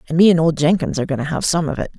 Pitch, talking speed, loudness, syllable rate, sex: 160 Hz, 360 wpm, -17 LUFS, 8.0 syllables/s, female